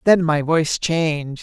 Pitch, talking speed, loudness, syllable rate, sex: 160 Hz, 170 wpm, -19 LUFS, 4.4 syllables/s, female